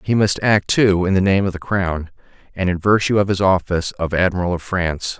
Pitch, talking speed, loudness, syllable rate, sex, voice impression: 95 Hz, 230 wpm, -18 LUFS, 5.6 syllables/s, male, masculine, adult-like, slightly thick, tensed, soft, muffled, cool, slightly mature, wild, lively, strict